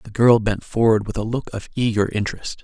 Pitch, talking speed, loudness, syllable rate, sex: 110 Hz, 230 wpm, -20 LUFS, 5.7 syllables/s, male